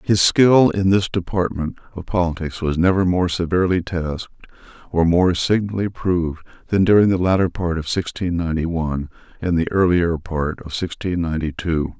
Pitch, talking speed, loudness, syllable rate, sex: 85 Hz, 165 wpm, -19 LUFS, 5.3 syllables/s, male